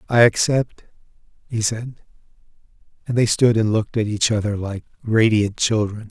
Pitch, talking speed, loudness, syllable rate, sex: 110 Hz, 145 wpm, -20 LUFS, 4.9 syllables/s, male